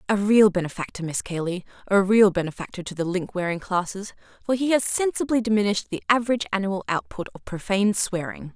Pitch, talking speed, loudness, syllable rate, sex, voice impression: 195 Hz, 175 wpm, -23 LUFS, 6.2 syllables/s, female, feminine, adult-like, tensed, powerful, fluent, slightly raspy, intellectual, elegant, lively, strict, intense, sharp